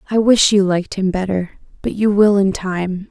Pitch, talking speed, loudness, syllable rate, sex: 195 Hz, 195 wpm, -16 LUFS, 4.9 syllables/s, female